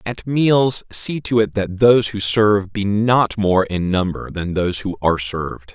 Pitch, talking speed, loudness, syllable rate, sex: 105 Hz, 200 wpm, -18 LUFS, 4.5 syllables/s, male